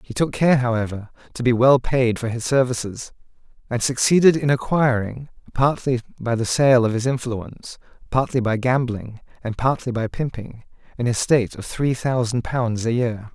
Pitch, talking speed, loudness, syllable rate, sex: 125 Hz, 165 wpm, -21 LUFS, 4.9 syllables/s, male